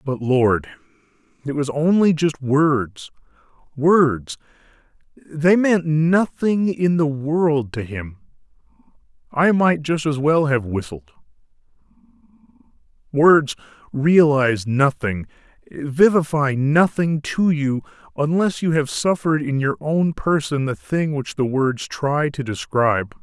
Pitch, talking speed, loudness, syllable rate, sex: 145 Hz, 115 wpm, -19 LUFS, 3.7 syllables/s, male